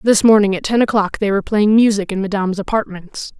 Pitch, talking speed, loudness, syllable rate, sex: 205 Hz, 210 wpm, -15 LUFS, 6.1 syllables/s, female